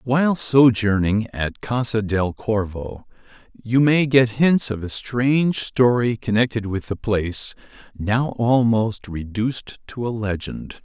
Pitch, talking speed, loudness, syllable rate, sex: 115 Hz, 125 wpm, -20 LUFS, 3.9 syllables/s, male